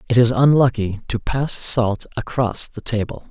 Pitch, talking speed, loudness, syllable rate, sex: 120 Hz, 165 wpm, -18 LUFS, 4.5 syllables/s, male